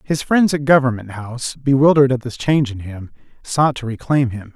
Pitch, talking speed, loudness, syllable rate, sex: 130 Hz, 195 wpm, -17 LUFS, 5.5 syllables/s, male